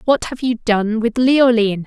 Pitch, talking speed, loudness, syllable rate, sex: 230 Hz, 195 wpm, -16 LUFS, 4.6 syllables/s, female